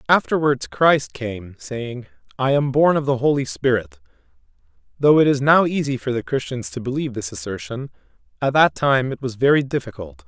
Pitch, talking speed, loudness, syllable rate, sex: 135 Hz, 175 wpm, -20 LUFS, 5.2 syllables/s, male